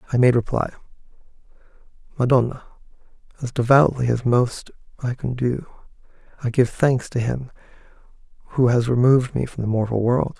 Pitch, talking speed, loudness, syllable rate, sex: 125 Hz, 140 wpm, -21 LUFS, 5.4 syllables/s, male